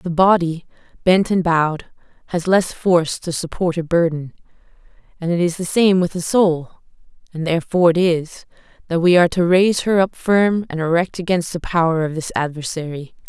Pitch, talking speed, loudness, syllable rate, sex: 170 Hz, 180 wpm, -18 LUFS, 5.4 syllables/s, female